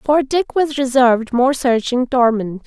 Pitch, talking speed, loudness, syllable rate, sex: 255 Hz, 160 wpm, -16 LUFS, 4.2 syllables/s, female